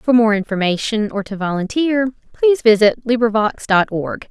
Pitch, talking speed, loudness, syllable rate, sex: 220 Hz, 155 wpm, -17 LUFS, 5.1 syllables/s, female